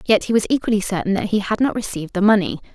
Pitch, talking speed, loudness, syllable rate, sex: 205 Hz, 260 wpm, -19 LUFS, 7.4 syllables/s, female